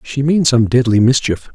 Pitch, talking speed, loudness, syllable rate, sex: 125 Hz, 195 wpm, -13 LUFS, 4.9 syllables/s, male